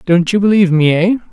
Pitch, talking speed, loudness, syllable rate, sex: 185 Hz, 225 wpm, -12 LUFS, 6.5 syllables/s, male